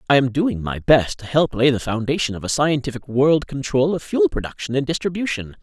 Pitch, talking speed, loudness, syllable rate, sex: 135 Hz, 215 wpm, -20 LUFS, 5.6 syllables/s, male